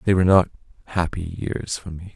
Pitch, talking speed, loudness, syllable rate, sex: 90 Hz, 195 wpm, -22 LUFS, 5.4 syllables/s, male